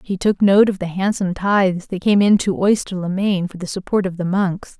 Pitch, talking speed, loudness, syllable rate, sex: 190 Hz, 250 wpm, -18 LUFS, 5.3 syllables/s, female